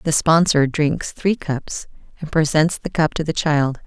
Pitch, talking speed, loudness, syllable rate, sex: 155 Hz, 185 wpm, -19 LUFS, 4.1 syllables/s, female